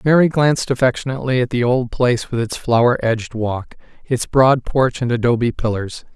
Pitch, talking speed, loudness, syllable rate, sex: 125 Hz, 175 wpm, -18 LUFS, 5.5 syllables/s, male